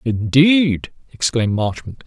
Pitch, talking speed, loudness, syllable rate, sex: 130 Hz, 85 wpm, -17 LUFS, 4.0 syllables/s, male